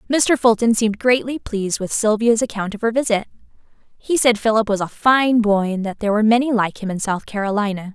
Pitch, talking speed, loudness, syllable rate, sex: 220 Hz, 210 wpm, -18 LUFS, 6.0 syllables/s, female